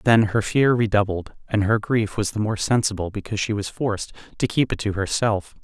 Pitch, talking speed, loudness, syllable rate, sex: 105 Hz, 215 wpm, -22 LUFS, 5.5 syllables/s, male